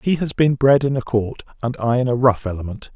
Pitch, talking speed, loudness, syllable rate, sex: 125 Hz, 265 wpm, -19 LUFS, 5.6 syllables/s, male